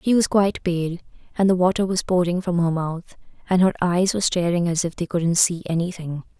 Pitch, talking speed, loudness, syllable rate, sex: 175 Hz, 215 wpm, -21 LUFS, 5.6 syllables/s, female